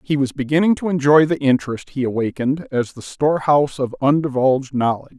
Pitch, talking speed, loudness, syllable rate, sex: 140 Hz, 175 wpm, -18 LUFS, 6.2 syllables/s, male